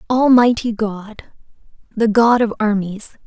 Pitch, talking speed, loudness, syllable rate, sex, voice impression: 220 Hz, 110 wpm, -16 LUFS, 3.7 syllables/s, female, very feminine, young, slightly soft, cute, slightly refreshing, friendly